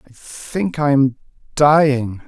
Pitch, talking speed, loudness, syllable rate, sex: 140 Hz, 105 wpm, -16 LUFS, 2.8 syllables/s, male